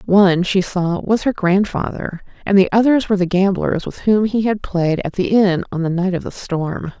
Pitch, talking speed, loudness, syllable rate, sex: 190 Hz, 225 wpm, -17 LUFS, 4.9 syllables/s, female